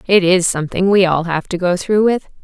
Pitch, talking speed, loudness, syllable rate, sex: 185 Hz, 245 wpm, -15 LUFS, 5.5 syllables/s, female